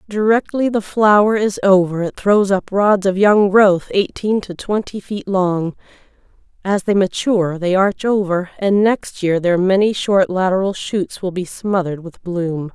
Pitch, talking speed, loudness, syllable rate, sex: 190 Hz, 170 wpm, -16 LUFS, 4.3 syllables/s, female